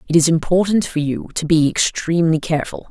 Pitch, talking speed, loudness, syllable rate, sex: 160 Hz, 185 wpm, -17 LUFS, 6.1 syllables/s, female